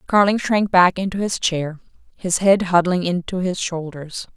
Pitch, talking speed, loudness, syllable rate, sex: 180 Hz, 165 wpm, -19 LUFS, 4.5 syllables/s, female